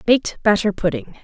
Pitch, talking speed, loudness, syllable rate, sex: 200 Hz, 145 wpm, -19 LUFS, 5.8 syllables/s, female